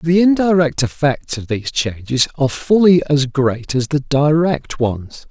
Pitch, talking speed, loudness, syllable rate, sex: 145 Hz, 160 wpm, -16 LUFS, 4.3 syllables/s, male